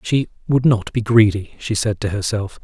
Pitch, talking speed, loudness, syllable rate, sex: 110 Hz, 205 wpm, -18 LUFS, 4.8 syllables/s, male